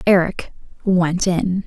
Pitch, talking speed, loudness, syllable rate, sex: 185 Hz, 110 wpm, -19 LUFS, 3.3 syllables/s, female